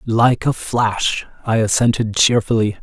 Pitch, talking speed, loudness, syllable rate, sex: 110 Hz, 125 wpm, -17 LUFS, 4.1 syllables/s, male